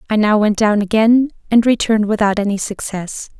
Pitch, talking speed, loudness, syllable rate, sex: 215 Hz, 175 wpm, -15 LUFS, 5.5 syllables/s, female